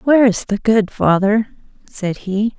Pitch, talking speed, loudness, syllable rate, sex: 210 Hz, 160 wpm, -16 LUFS, 4.4 syllables/s, female